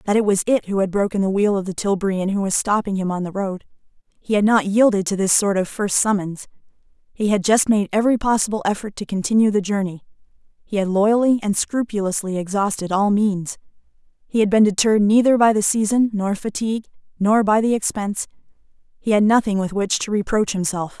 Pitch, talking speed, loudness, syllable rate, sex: 205 Hz, 205 wpm, -19 LUFS, 5.9 syllables/s, female